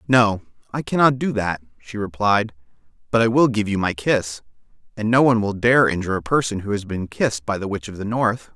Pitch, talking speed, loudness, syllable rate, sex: 110 Hz, 225 wpm, -20 LUFS, 5.7 syllables/s, male